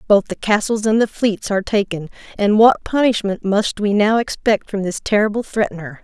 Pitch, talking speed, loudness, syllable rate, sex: 210 Hz, 190 wpm, -17 LUFS, 5.2 syllables/s, female